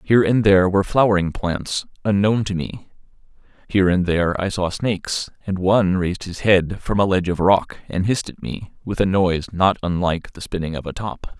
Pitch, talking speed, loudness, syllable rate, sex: 95 Hz, 205 wpm, -20 LUFS, 5.6 syllables/s, male